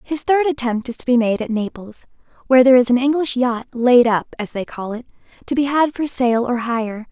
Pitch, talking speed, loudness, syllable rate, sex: 250 Hz, 235 wpm, -18 LUFS, 5.4 syllables/s, female